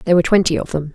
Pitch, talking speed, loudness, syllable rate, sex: 165 Hz, 320 wpm, -16 LUFS, 8.8 syllables/s, female